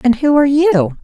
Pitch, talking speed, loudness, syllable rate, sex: 260 Hz, 230 wpm, -12 LUFS, 5.6 syllables/s, female